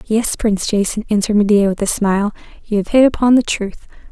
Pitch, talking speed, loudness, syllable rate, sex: 210 Hz, 205 wpm, -16 LUFS, 6.3 syllables/s, female